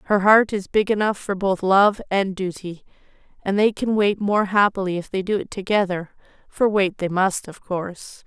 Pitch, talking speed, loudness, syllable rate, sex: 195 Hz, 190 wpm, -21 LUFS, 4.8 syllables/s, female